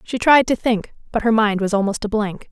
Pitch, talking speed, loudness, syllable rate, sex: 220 Hz, 260 wpm, -18 LUFS, 5.4 syllables/s, female